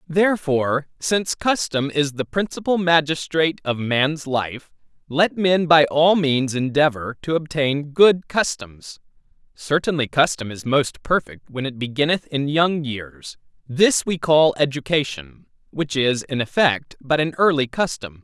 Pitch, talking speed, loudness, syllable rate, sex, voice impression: 145 Hz, 140 wpm, -20 LUFS, 4.2 syllables/s, male, masculine, adult-like, tensed, bright, clear, fluent, intellectual, friendly, slightly unique, wild, lively, intense, light